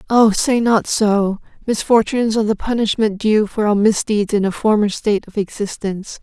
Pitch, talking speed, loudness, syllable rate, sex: 210 Hz, 175 wpm, -17 LUFS, 5.2 syllables/s, female